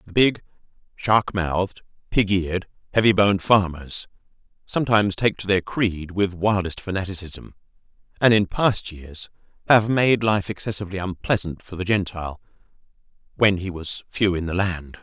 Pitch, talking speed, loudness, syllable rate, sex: 95 Hz, 145 wpm, -22 LUFS, 5.0 syllables/s, male